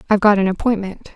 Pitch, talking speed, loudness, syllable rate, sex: 200 Hz, 205 wpm, -17 LUFS, 7.5 syllables/s, female